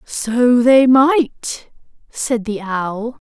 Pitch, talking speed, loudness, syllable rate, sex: 240 Hz, 110 wpm, -15 LUFS, 2.2 syllables/s, female